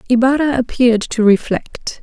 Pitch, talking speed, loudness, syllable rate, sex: 245 Hz, 120 wpm, -15 LUFS, 5.0 syllables/s, female